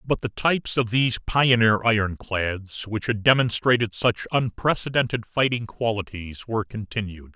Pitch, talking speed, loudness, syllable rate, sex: 110 Hz, 130 wpm, -23 LUFS, 4.7 syllables/s, male